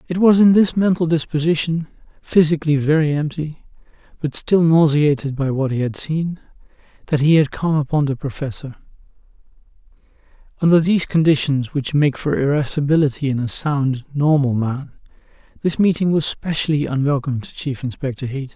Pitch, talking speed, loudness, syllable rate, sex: 150 Hz, 145 wpm, -18 LUFS, 5.4 syllables/s, male